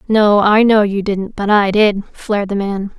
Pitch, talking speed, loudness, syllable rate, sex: 205 Hz, 220 wpm, -14 LUFS, 4.3 syllables/s, female